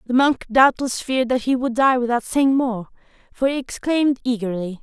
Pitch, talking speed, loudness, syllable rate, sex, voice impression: 250 Hz, 185 wpm, -20 LUFS, 5.3 syllables/s, female, very feminine, gender-neutral, very young, very thin, very tensed, slightly powerful, very bright, hard, very clear, very fluent, very cute, intellectual, very refreshing, sincere, calm, very friendly, very reassuring, very unique, elegant, very wild, very lively, slightly kind, intense, sharp, very light